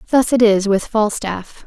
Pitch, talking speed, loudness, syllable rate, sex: 215 Hz, 180 wpm, -16 LUFS, 4.2 syllables/s, female